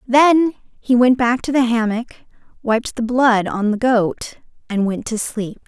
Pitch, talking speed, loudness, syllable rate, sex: 235 Hz, 180 wpm, -17 LUFS, 4.1 syllables/s, female